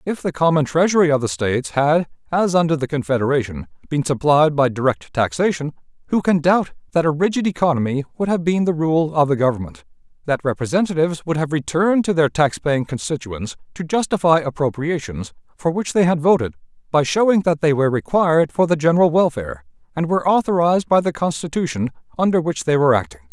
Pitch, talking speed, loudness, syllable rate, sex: 155 Hz, 185 wpm, -19 LUFS, 6.1 syllables/s, male